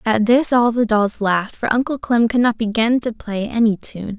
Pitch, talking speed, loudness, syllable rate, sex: 225 Hz, 230 wpm, -18 LUFS, 4.9 syllables/s, female